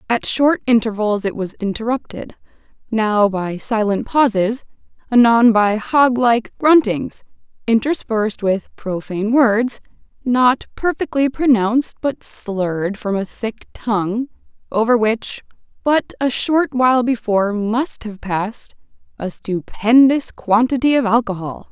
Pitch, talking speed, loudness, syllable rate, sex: 230 Hz, 115 wpm, -17 LUFS, 4.1 syllables/s, female